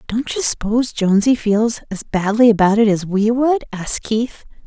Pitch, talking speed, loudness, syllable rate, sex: 220 Hz, 180 wpm, -17 LUFS, 4.8 syllables/s, female